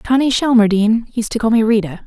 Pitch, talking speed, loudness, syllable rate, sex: 225 Hz, 205 wpm, -15 LUFS, 6.3 syllables/s, female